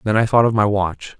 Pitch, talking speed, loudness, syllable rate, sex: 105 Hz, 300 wpm, -17 LUFS, 5.6 syllables/s, male